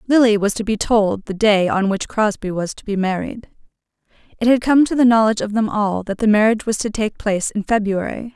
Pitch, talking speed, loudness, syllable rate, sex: 215 Hz, 230 wpm, -18 LUFS, 5.7 syllables/s, female